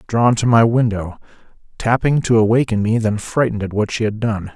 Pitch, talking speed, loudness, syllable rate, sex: 110 Hz, 200 wpm, -17 LUFS, 5.5 syllables/s, male